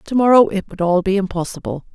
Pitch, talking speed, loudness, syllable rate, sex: 195 Hz, 215 wpm, -17 LUFS, 6.3 syllables/s, female